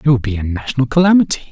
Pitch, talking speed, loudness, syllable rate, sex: 135 Hz, 240 wpm, -15 LUFS, 8.2 syllables/s, male